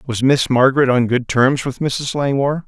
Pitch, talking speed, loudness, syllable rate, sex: 130 Hz, 200 wpm, -16 LUFS, 5.1 syllables/s, male